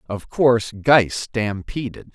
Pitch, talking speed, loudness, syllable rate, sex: 115 Hz, 110 wpm, -20 LUFS, 3.6 syllables/s, male